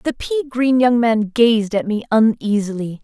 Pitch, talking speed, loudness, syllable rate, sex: 225 Hz, 180 wpm, -17 LUFS, 4.4 syllables/s, female